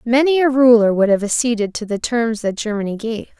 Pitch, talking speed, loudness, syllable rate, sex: 230 Hz, 210 wpm, -17 LUFS, 5.6 syllables/s, female